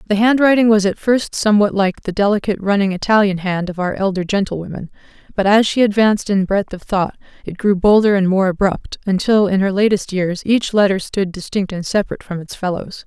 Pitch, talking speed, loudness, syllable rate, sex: 200 Hz, 200 wpm, -16 LUFS, 5.8 syllables/s, female